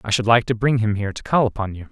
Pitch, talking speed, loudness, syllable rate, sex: 110 Hz, 345 wpm, -20 LUFS, 7.2 syllables/s, male